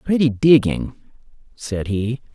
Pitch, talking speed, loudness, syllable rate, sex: 125 Hz, 100 wpm, -18 LUFS, 3.9 syllables/s, male